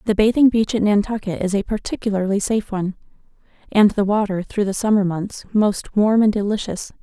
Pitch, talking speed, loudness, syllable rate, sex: 205 Hz, 180 wpm, -19 LUFS, 5.7 syllables/s, female